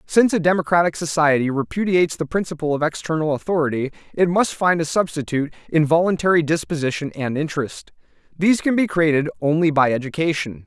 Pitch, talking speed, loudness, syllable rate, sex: 160 Hz, 150 wpm, -20 LUFS, 6.2 syllables/s, male